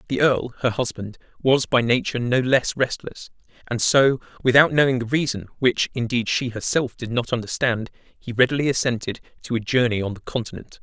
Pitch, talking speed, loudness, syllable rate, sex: 120 Hz, 165 wpm, -21 LUFS, 5.4 syllables/s, male